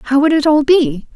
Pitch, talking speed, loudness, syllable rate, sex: 290 Hz, 260 wpm, -13 LUFS, 4.7 syllables/s, female